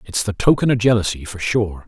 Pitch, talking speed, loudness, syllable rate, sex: 105 Hz, 225 wpm, -18 LUFS, 5.7 syllables/s, male